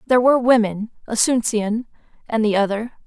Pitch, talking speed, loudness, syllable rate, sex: 225 Hz, 135 wpm, -19 LUFS, 5.7 syllables/s, female